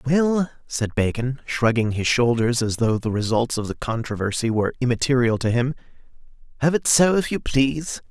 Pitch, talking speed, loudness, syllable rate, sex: 125 Hz, 170 wpm, -21 LUFS, 5.2 syllables/s, male